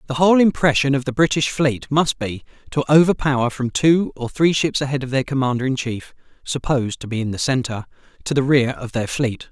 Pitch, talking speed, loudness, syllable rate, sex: 135 Hz, 215 wpm, -19 LUFS, 5.0 syllables/s, male